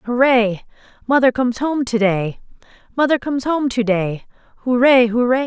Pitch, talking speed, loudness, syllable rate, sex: 245 Hz, 145 wpm, -17 LUFS, 4.9 syllables/s, female